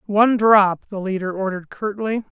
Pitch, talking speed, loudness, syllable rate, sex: 200 Hz, 150 wpm, -19 LUFS, 5.5 syllables/s, male